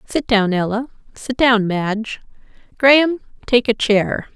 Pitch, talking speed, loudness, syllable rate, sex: 230 Hz, 110 wpm, -17 LUFS, 4.2 syllables/s, female